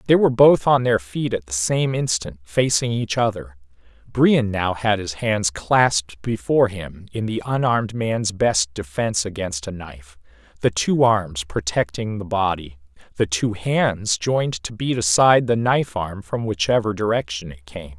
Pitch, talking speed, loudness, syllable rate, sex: 105 Hz, 170 wpm, -20 LUFS, 4.6 syllables/s, male